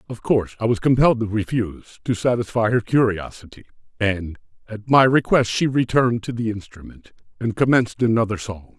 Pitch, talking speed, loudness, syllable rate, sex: 110 Hz, 165 wpm, -20 LUFS, 5.8 syllables/s, male